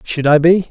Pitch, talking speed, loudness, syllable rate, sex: 160 Hz, 255 wpm, -12 LUFS, 4.9 syllables/s, male